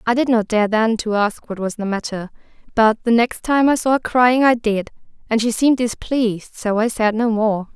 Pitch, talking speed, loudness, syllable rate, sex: 225 Hz, 225 wpm, -18 LUFS, 5.0 syllables/s, female